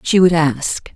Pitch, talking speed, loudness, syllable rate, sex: 165 Hz, 190 wpm, -15 LUFS, 3.6 syllables/s, female